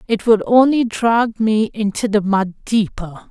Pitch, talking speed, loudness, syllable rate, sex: 215 Hz, 165 wpm, -16 LUFS, 3.9 syllables/s, female